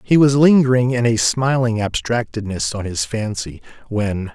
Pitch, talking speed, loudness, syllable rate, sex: 115 Hz, 150 wpm, -18 LUFS, 4.6 syllables/s, male